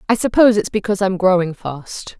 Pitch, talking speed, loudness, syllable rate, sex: 195 Hz, 190 wpm, -16 LUFS, 6.0 syllables/s, female